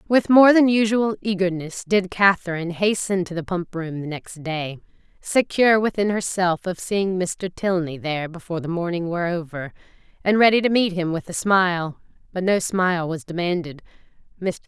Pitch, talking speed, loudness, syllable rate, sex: 185 Hz, 170 wpm, -21 LUFS, 5.2 syllables/s, female